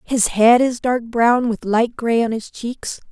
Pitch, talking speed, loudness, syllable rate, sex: 235 Hz, 210 wpm, -17 LUFS, 3.8 syllables/s, female